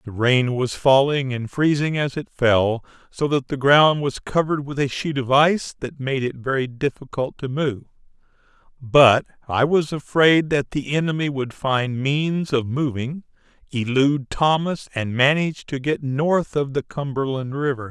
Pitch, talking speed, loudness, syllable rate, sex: 140 Hz, 170 wpm, -21 LUFS, 4.5 syllables/s, male